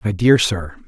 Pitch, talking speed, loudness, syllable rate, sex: 100 Hz, 205 wpm, -16 LUFS, 4.4 syllables/s, male